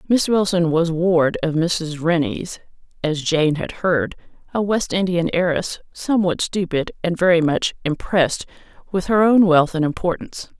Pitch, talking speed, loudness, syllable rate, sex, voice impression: 170 Hz, 155 wpm, -19 LUFS, 4.6 syllables/s, female, very feminine, adult-like, slightly middle-aged, very thin, tensed, slightly powerful, bright, hard, very clear, very fluent, slightly raspy, cool, very intellectual, refreshing, very sincere, calm, slightly friendly, reassuring, very unique, very elegant, slightly sweet, lively, slightly kind, strict, sharp